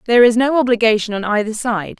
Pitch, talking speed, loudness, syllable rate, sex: 230 Hz, 210 wpm, -15 LUFS, 6.6 syllables/s, female